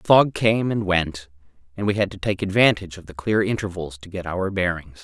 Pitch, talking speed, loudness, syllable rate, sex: 95 Hz, 225 wpm, -22 LUFS, 5.5 syllables/s, male